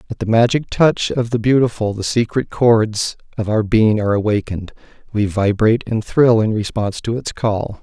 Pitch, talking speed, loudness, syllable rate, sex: 110 Hz, 185 wpm, -17 LUFS, 5.1 syllables/s, male